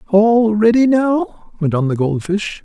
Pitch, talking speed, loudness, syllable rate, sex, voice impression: 205 Hz, 180 wpm, -15 LUFS, 3.7 syllables/s, male, very masculine, very adult-like, middle-aged, very thick, tensed, slightly powerful, bright, soft, muffled, fluent, raspy, cool, very intellectual, slightly refreshing, sincere, very mature, friendly, reassuring, elegant, slightly sweet, slightly lively, very kind